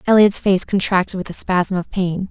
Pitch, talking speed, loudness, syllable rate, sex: 190 Hz, 210 wpm, -17 LUFS, 5.1 syllables/s, female